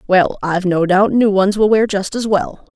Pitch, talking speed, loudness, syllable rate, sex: 195 Hz, 240 wpm, -15 LUFS, 4.8 syllables/s, female